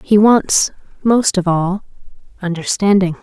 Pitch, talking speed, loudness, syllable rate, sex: 195 Hz, 110 wpm, -15 LUFS, 4.0 syllables/s, female